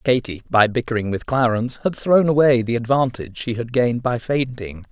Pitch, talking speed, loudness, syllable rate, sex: 120 Hz, 185 wpm, -20 LUFS, 5.6 syllables/s, male